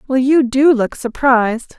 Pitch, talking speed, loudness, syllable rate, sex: 255 Hz, 170 wpm, -14 LUFS, 4.3 syllables/s, female